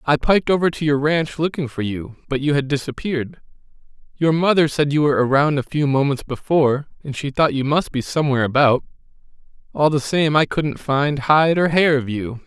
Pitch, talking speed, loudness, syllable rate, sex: 145 Hz, 200 wpm, -19 LUFS, 5.6 syllables/s, male